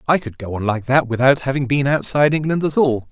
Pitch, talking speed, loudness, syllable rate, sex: 135 Hz, 250 wpm, -18 LUFS, 6.1 syllables/s, male